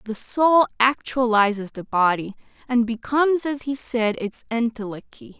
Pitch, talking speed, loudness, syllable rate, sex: 235 Hz, 135 wpm, -21 LUFS, 4.5 syllables/s, female